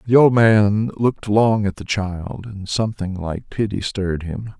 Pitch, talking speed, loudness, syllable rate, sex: 105 Hz, 185 wpm, -19 LUFS, 4.5 syllables/s, male